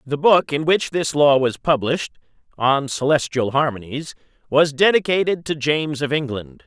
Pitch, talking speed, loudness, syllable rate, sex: 145 Hz, 155 wpm, -19 LUFS, 4.2 syllables/s, male